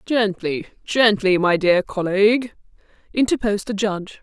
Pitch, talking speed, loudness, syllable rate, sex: 205 Hz, 115 wpm, -19 LUFS, 4.8 syllables/s, female